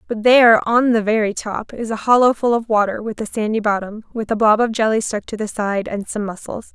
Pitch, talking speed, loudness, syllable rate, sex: 220 Hz, 250 wpm, -17 LUFS, 5.5 syllables/s, female